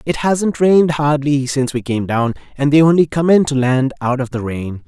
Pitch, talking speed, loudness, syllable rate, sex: 140 Hz, 235 wpm, -15 LUFS, 5.2 syllables/s, male